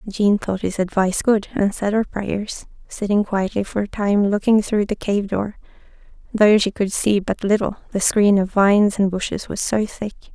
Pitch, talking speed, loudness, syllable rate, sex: 205 Hz, 195 wpm, -19 LUFS, 4.8 syllables/s, female